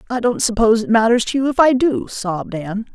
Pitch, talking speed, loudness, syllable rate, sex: 225 Hz, 245 wpm, -17 LUFS, 6.4 syllables/s, female